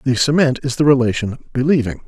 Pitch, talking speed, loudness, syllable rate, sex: 130 Hz, 175 wpm, -16 LUFS, 6.6 syllables/s, male